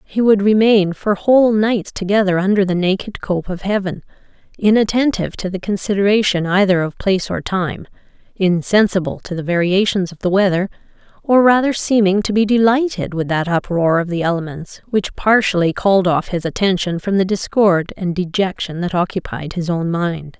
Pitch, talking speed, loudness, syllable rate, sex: 190 Hz, 170 wpm, -16 LUFS, 5.2 syllables/s, female